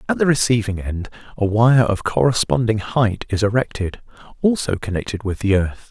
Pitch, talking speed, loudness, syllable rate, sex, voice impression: 105 Hz, 165 wpm, -19 LUFS, 5.2 syllables/s, male, very masculine, very middle-aged, very thick, tensed, slightly weak, bright, soft, clear, fluent, slightly raspy, cool, very intellectual, refreshing, very sincere, calm, mature, very friendly, reassuring, unique, very elegant, slightly wild, sweet, very lively, kind, slightly intense